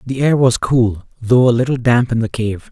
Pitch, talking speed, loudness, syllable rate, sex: 120 Hz, 245 wpm, -15 LUFS, 5.0 syllables/s, male